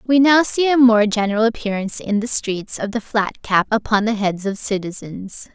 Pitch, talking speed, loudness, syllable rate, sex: 215 Hz, 205 wpm, -18 LUFS, 5.0 syllables/s, female